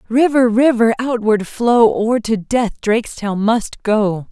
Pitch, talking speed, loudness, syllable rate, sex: 225 Hz, 140 wpm, -16 LUFS, 3.8 syllables/s, female